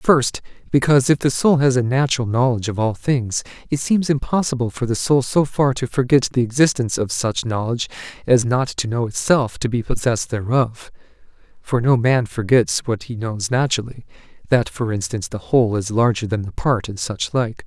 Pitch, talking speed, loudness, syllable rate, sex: 120 Hz, 195 wpm, -19 LUFS, 5.4 syllables/s, male